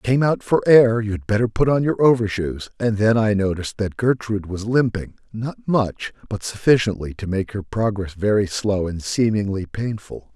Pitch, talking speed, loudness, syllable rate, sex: 110 Hz, 185 wpm, -20 LUFS, 5.0 syllables/s, male